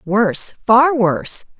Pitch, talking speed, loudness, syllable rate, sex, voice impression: 215 Hz, 115 wpm, -15 LUFS, 3.9 syllables/s, female, very feminine, adult-like, slightly middle-aged, slightly thin, very tensed, powerful, bright, slightly hard, very clear, fluent, cool, intellectual, slightly refreshing, sincere, calm, slightly friendly, reassuring, elegant, slightly sweet, lively, strict, sharp